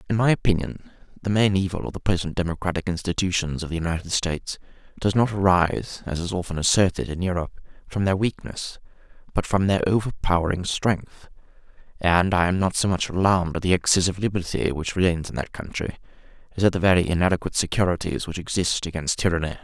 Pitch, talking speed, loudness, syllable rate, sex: 90 Hz, 175 wpm, -23 LUFS, 6.3 syllables/s, male